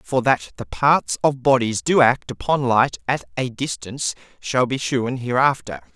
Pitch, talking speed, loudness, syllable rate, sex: 125 Hz, 170 wpm, -20 LUFS, 4.4 syllables/s, male